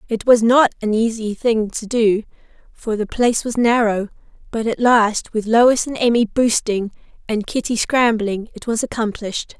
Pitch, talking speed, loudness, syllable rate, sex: 225 Hz, 170 wpm, -18 LUFS, 4.7 syllables/s, female